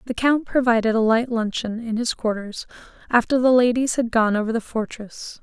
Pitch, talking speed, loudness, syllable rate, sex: 230 Hz, 190 wpm, -21 LUFS, 5.2 syllables/s, female